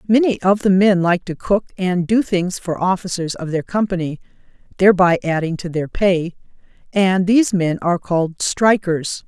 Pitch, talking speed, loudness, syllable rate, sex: 185 Hz, 170 wpm, -18 LUFS, 4.9 syllables/s, female